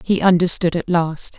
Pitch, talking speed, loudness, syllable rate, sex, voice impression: 170 Hz, 175 wpm, -17 LUFS, 4.7 syllables/s, female, very feminine, slightly middle-aged, very thin, very tensed, powerful, very bright, hard, very clear, very fluent, cool, slightly intellectual, very refreshing, slightly sincere, slightly calm, slightly friendly, slightly reassuring, very unique, elegant, wild, slightly sweet, very lively, strict, intense, sharp, light